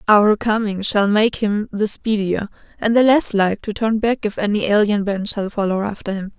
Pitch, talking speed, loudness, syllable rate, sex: 210 Hz, 205 wpm, -18 LUFS, 4.9 syllables/s, female